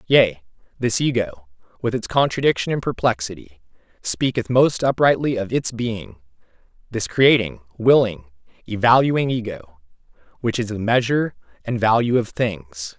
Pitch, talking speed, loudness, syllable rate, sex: 110 Hz, 120 wpm, -20 LUFS, 4.6 syllables/s, male